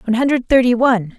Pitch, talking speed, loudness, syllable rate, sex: 240 Hz, 205 wpm, -15 LUFS, 7.0 syllables/s, female